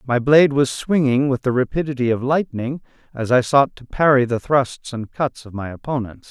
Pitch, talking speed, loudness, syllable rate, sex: 130 Hz, 200 wpm, -19 LUFS, 5.1 syllables/s, male